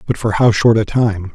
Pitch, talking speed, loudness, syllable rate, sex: 105 Hz, 265 wpm, -14 LUFS, 5.0 syllables/s, male